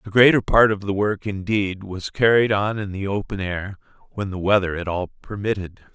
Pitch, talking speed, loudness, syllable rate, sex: 100 Hz, 200 wpm, -21 LUFS, 5.0 syllables/s, male